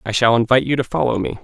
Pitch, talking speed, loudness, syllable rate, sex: 120 Hz, 290 wpm, -17 LUFS, 7.5 syllables/s, male